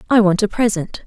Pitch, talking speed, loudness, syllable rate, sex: 205 Hz, 225 wpm, -17 LUFS, 5.8 syllables/s, female